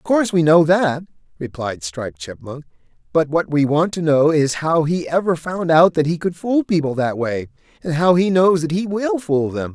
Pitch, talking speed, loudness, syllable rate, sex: 160 Hz, 220 wpm, -18 LUFS, 4.9 syllables/s, male